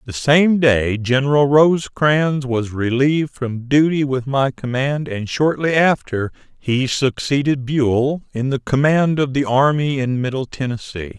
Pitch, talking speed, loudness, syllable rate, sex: 135 Hz, 145 wpm, -17 LUFS, 4.1 syllables/s, male